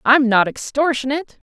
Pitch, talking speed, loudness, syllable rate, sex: 265 Hz, 120 wpm, -18 LUFS, 5.3 syllables/s, female